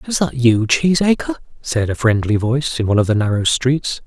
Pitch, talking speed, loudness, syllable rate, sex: 125 Hz, 205 wpm, -17 LUFS, 5.5 syllables/s, male